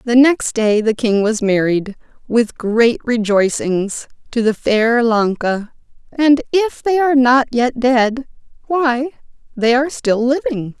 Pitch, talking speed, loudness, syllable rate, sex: 240 Hz, 140 wpm, -16 LUFS, 3.9 syllables/s, female